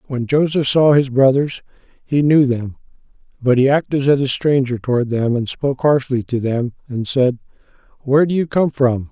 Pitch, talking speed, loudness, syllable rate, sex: 135 Hz, 185 wpm, -17 LUFS, 5.1 syllables/s, male